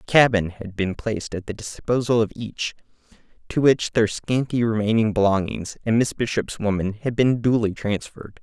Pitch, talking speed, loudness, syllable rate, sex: 110 Hz, 170 wpm, -22 LUFS, 5.2 syllables/s, male